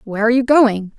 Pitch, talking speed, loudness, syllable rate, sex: 230 Hz, 245 wpm, -14 LUFS, 7.0 syllables/s, female